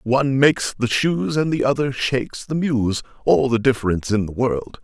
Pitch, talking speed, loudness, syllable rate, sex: 125 Hz, 185 wpm, -20 LUFS, 5.2 syllables/s, male